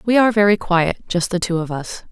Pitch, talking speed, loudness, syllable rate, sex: 190 Hz, 255 wpm, -18 LUFS, 6.0 syllables/s, female